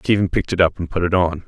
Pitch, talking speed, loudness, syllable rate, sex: 90 Hz, 325 wpm, -19 LUFS, 7.0 syllables/s, male